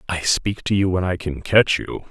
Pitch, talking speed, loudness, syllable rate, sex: 90 Hz, 255 wpm, -20 LUFS, 4.7 syllables/s, male